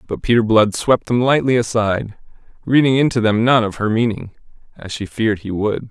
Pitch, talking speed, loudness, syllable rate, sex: 115 Hz, 195 wpm, -17 LUFS, 5.5 syllables/s, male